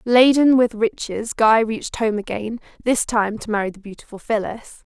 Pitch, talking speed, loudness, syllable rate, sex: 225 Hz, 170 wpm, -19 LUFS, 4.9 syllables/s, female